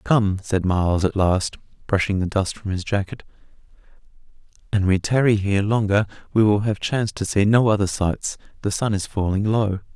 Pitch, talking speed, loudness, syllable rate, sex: 100 Hz, 180 wpm, -21 LUFS, 5.3 syllables/s, male